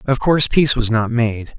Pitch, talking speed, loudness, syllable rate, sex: 120 Hz, 225 wpm, -16 LUFS, 5.4 syllables/s, male